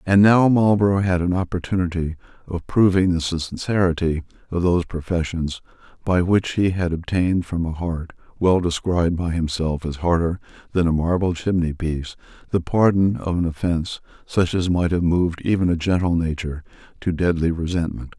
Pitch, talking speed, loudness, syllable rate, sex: 85 Hz, 160 wpm, -21 LUFS, 5.3 syllables/s, male